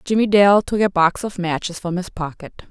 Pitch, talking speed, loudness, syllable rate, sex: 185 Hz, 220 wpm, -18 LUFS, 5.0 syllables/s, female